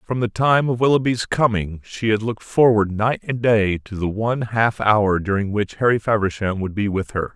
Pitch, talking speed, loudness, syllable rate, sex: 110 Hz, 210 wpm, -20 LUFS, 5.0 syllables/s, male